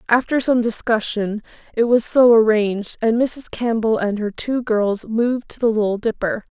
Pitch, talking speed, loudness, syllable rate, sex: 225 Hz, 175 wpm, -19 LUFS, 4.8 syllables/s, female